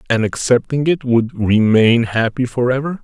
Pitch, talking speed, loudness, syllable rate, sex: 120 Hz, 160 wpm, -16 LUFS, 4.6 syllables/s, male